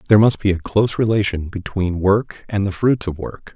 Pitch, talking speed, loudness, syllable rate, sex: 100 Hz, 220 wpm, -19 LUFS, 5.4 syllables/s, male